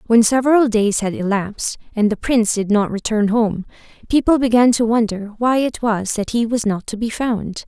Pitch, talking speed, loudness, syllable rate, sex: 225 Hz, 205 wpm, -18 LUFS, 5.1 syllables/s, female